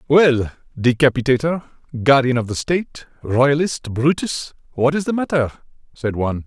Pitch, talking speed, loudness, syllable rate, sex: 135 Hz, 130 wpm, -19 LUFS, 4.8 syllables/s, male